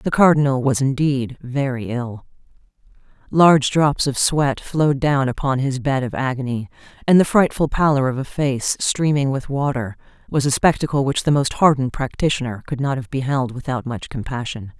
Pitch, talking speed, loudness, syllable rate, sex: 135 Hz, 170 wpm, -19 LUFS, 5.1 syllables/s, female